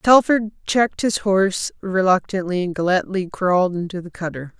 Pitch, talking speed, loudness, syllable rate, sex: 190 Hz, 145 wpm, -20 LUFS, 5.3 syllables/s, female